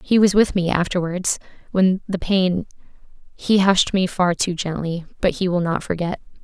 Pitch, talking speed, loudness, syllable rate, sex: 180 Hz, 170 wpm, -20 LUFS, 4.7 syllables/s, female